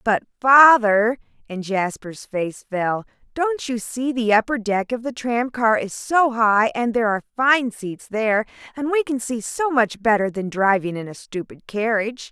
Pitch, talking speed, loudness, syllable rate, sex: 225 Hz, 185 wpm, -20 LUFS, 4.5 syllables/s, female